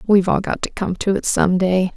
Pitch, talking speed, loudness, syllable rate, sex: 190 Hz, 275 wpm, -18 LUFS, 5.5 syllables/s, female